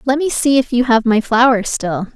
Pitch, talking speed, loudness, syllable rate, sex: 240 Hz, 250 wpm, -14 LUFS, 5.1 syllables/s, female